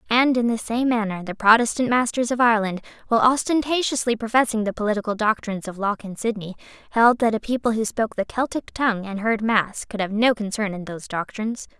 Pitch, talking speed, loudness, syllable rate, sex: 220 Hz, 200 wpm, -22 LUFS, 6.2 syllables/s, female